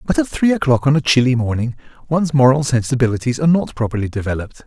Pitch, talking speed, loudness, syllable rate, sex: 130 Hz, 195 wpm, -17 LUFS, 7.1 syllables/s, male